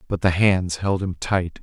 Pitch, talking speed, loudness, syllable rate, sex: 90 Hz, 220 wpm, -21 LUFS, 4.1 syllables/s, male